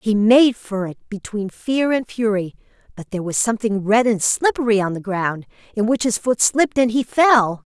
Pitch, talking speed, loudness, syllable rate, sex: 220 Hz, 200 wpm, -18 LUFS, 5.0 syllables/s, female